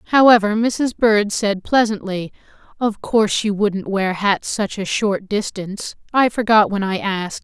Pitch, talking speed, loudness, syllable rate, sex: 205 Hz, 155 wpm, -18 LUFS, 4.5 syllables/s, female